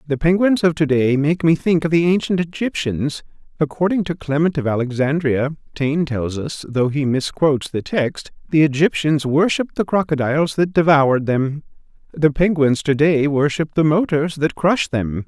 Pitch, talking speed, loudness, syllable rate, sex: 150 Hz, 160 wpm, -18 LUFS, 4.9 syllables/s, male